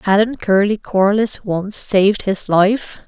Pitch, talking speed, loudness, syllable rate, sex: 205 Hz, 135 wpm, -16 LUFS, 3.5 syllables/s, female